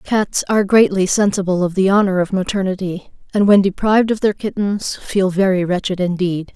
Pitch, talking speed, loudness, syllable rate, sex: 190 Hz, 175 wpm, -16 LUFS, 5.3 syllables/s, female